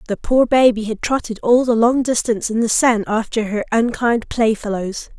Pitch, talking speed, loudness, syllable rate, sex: 230 Hz, 185 wpm, -17 LUFS, 5.0 syllables/s, female